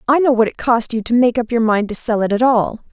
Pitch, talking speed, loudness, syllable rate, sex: 230 Hz, 330 wpm, -16 LUFS, 6.0 syllables/s, female